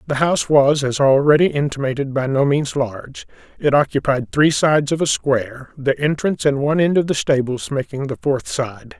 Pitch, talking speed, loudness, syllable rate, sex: 140 Hz, 195 wpm, -18 LUFS, 5.4 syllables/s, male